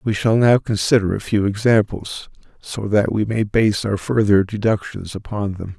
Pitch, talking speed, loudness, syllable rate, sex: 105 Hz, 175 wpm, -18 LUFS, 4.6 syllables/s, male